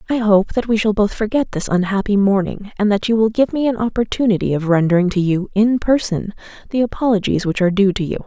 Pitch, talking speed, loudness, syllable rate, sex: 210 Hz, 225 wpm, -17 LUFS, 6.1 syllables/s, female